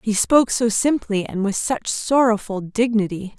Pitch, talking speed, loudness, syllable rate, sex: 220 Hz, 160 wpm, -20 LUFS, 4.6 syllables/s, female